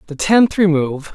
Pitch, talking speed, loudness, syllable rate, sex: 170 Hz, 155 wpm, -15 LUFS, 5.2 syllables/s, male